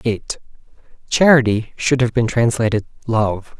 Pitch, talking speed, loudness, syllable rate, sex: 115 Hz, 115 wpm, -17 LUFS, 4.6 syllables/s, male